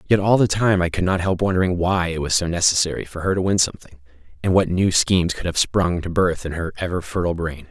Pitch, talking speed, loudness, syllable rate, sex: 90 Hz, 255 wpm, -20 LUFS, 6.3 syllables/s, male